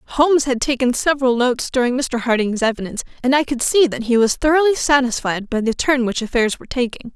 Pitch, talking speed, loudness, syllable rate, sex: 255 Hz, 210 wpm, -18 LUFS, 6.2 syllables/s, female